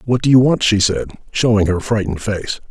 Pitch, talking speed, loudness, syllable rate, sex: 105 Hz, 220 wpm, -16 LUFS, 5.6 syllables/s, male